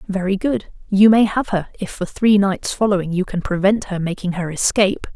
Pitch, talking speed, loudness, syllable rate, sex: 195 Hz, 210 wpm, -18 LUFS, 5.3 syllables/s, female